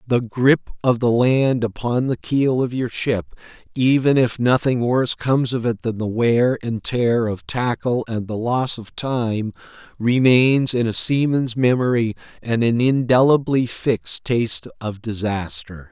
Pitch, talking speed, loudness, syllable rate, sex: 120 Hz, 155 wpm, -19 LUFS, 4.1 syllables/s, male